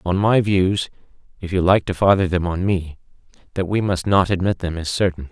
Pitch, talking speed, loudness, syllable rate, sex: 90 Hz, 215 wpm, -19 LUFS, 5.3 syllables/s, male